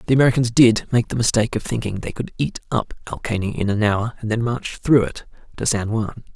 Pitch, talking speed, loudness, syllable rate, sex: 115 Hz, 235 wpm, -20 LUFS, 6.0 syllables/s, male